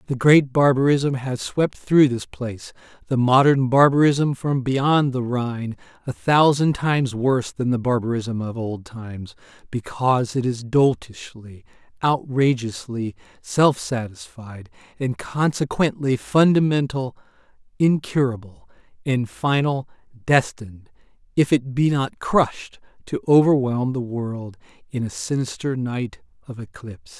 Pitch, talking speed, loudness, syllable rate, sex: 130 Hz, 115 wpm, -21 LUFS, 4.2 syllables/s, male